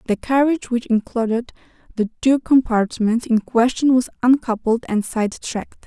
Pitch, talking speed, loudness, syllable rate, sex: 240 Hz, 145 wpm, -19 LUFS, 4.9 syllables/s, female